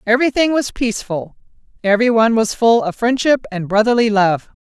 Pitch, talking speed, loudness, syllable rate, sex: 225 Hz, 140 wpm, -16 LUFS, 5.6 syllables/s, female